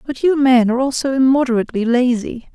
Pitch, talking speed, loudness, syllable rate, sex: 255 Hz, 190 wpm, -16 LUFS, 6.2 syllables/s, female